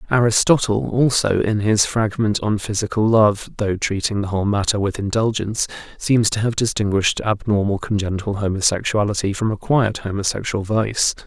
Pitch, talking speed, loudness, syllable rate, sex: 105 Hz, 140 wpm, -19 LUFS, 5.4 syllables/s, male